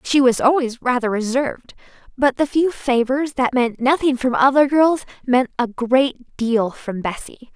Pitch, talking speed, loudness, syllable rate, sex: 255 Hz, 165 wpm, -18 LUFS, 4.3 syllables/s, female